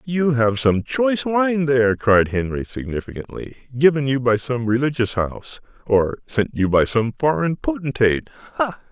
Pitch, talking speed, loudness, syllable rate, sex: 125 Hz, 155 wpm, -20 LUFS, 4.9 syllables/s, male